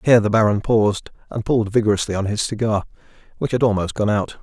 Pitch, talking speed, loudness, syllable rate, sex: 105 Hz, 205 wpm, -19 LUFS, 6.7 syllables/s, male